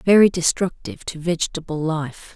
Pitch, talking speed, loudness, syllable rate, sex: 170 Hz, 125 wpm, -21 LUFS, 5.2 syllables/s, female